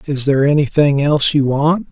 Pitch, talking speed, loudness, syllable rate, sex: 145 Hz, 190 wpm, -14 LUFS, 5.6 syllables/s, male